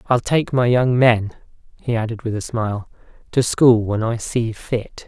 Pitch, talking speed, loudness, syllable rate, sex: 115 Hz, 190 wpm, -19 LUFS, 4.4 syllables/s, male